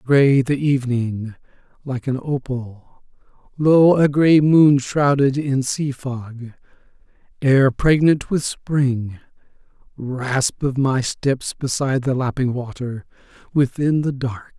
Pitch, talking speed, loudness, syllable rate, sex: 135 Hz, 120 wpm, -19 LUFS, 3.5 syllables/s, male